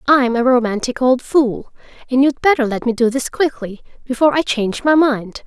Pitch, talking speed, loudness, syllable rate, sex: 255 Hz, 195 wpm, -16 LUFS, 5.3 syllables/s, female